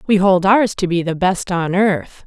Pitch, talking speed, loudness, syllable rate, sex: 185 Hz, 240 wpm, -16 LUFS, 4.3 syllables/s, female